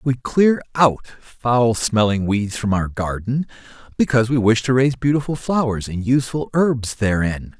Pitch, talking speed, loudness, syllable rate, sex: 120 Hz, 160 wpm, -19 LUFS, 4.7 syllables/s, male